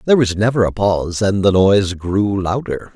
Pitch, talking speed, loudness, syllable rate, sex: 100 Hz, 205 wpm, -16 LUFS, 5.3 syllables/s, male